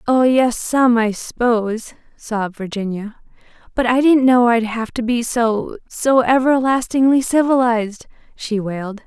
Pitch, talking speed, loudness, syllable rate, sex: 235 Hz, 120 wpm, -17 LUFS, 4.3 syllables/s, female